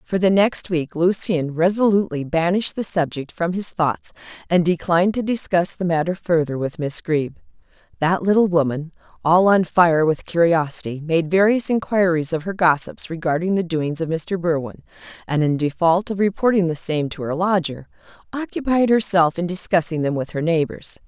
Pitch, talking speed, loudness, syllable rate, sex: 175 Hz, 170 wpm, -20 LUFS, 5.1 syllables/s, female